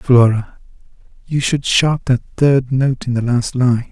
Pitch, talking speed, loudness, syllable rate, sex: 125 Hz, 170 wpm, -16 LUFS, 3.7 syllables/s, male